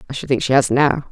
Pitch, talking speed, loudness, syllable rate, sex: 135 Hz, 320 wpm, -17 LUFS, 6.7 syllables/s, female